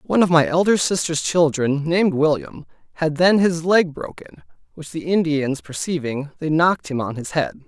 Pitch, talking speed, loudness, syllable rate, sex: 160 Hz, 180 wpm, -19 LUFS, 5.3 syllables/s, male